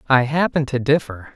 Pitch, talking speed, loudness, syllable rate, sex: 135 Hz, 175 wpm, -19 LUFS, 5.1 syllables/s, male